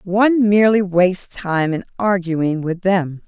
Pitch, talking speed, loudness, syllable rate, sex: 185 Hz, 145 wpm, -17 LUFS, 4.3 syllables/s, female